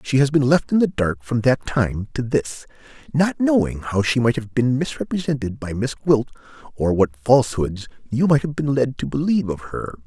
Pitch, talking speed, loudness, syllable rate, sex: 125 Hz, 210 wpm, -20 LUFS, 5.1 syllables/s, male